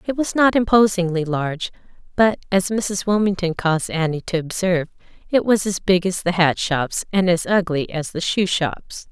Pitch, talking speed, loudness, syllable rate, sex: 185 Hz, 185 wpm, -19 LUFS, 4.9 syllables/s, female